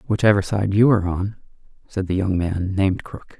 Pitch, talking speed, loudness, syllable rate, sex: 100 Hz, 195 wpm, -20 LUFS, 5.5 syllables/s, male